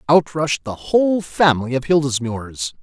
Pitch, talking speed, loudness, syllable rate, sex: 140 Hz, 150 wpm, -19 LUFS, 5.1 syllables/s, male